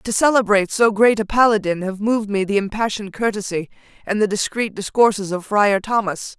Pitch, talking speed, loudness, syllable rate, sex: 210 Hz, 180 wpm, -19 LUFS, 5.7 syllables/s, female